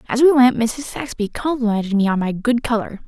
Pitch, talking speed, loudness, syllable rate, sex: 235 Hz, 215 wpm, -18 LUFS, 5.6 syllables/s, female